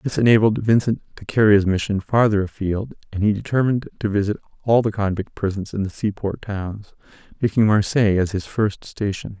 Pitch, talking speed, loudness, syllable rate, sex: 105 Hz, 180 wpm, -20 LUFS, 5.6 syllables/s, male